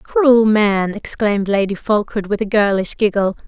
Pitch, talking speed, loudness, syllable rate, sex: 205 Hz, 155 wpm, -16 LUFS, 4.8 syllables/s, female